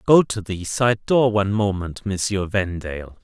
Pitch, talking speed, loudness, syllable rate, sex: 100 Hz, 165 wpm, -21 LUFS, 4.5 syllables/s, male